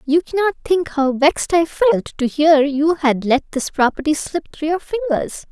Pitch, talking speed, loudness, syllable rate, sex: 300 Hz, 195 wpm, -18 LUFS, 4.4 syllables/s, female